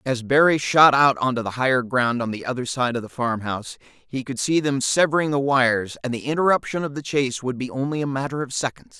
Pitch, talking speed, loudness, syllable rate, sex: 130 Hz, 235 wpm, -21 LUFS, 5.9 syllables/s, male